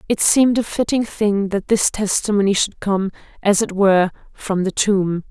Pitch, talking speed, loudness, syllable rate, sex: 200 Hz, 180 wpm, -18 LUFS, 4.8 syllables/s, female